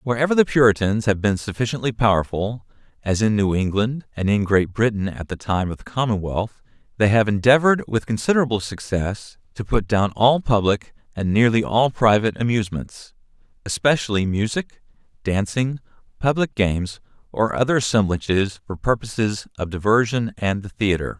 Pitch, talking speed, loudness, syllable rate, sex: 110 Hz, 145 wpm, -21 LUFS, 5.3 syllables/s, male